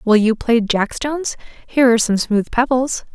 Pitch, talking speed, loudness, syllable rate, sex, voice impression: 240 Hz, 190 wpm, -17 LUFS, 5.1 syllables/s, female, feminine, adult-like, tensed, bright, soft, clear, fluent, intellectual, calm, friendly, reassuring, elegant, lively, slightly kind